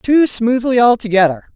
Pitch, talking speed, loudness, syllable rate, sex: 230 Hz, 115 wpm, -14 LUFS, 4.7 syllables/s, female